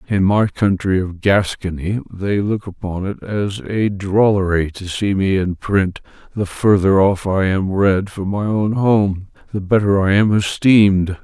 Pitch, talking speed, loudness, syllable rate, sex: 100 Hz, 170 wpm, -17 LUFS, 4.1 syllables/s, male